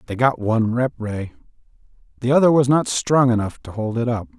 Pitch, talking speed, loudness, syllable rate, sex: 120 Hz, 205 wpm, -19 LUFS, 5.6 syllables/s, male